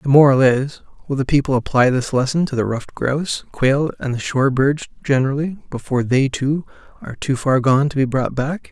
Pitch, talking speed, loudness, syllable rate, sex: 135 Hz, 205 wpm, -18 LUFS, 5.6 syllables/s, male